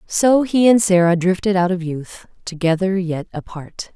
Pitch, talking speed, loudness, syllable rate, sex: 185 Hz, 165 wpm, -17 LUFS, 4.4 syllables/s, female